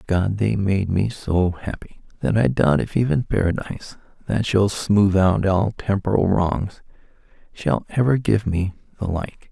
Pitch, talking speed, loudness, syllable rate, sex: 100 Hz, 165 wpm, -21 LUFS, 4.3 syllables/s, male